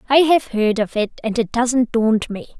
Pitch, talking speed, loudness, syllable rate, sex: 235 Hz, 210 wpm, -18 LUFS, 4.6 syllables/s, female